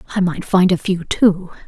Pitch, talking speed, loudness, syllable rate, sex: 185 Hz, 215 wpm, -17 LUFS, 5.0 syllables/s, female